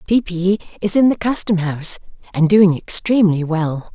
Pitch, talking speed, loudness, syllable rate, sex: 185 Hz, 150 wpm, -16 LUFS, 5.1 syllables/s, female